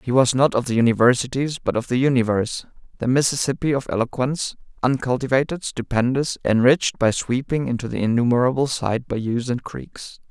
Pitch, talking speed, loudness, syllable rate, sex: 125 Hz, 150 wpm, -21 LUFS, 5.6 syllables/s, male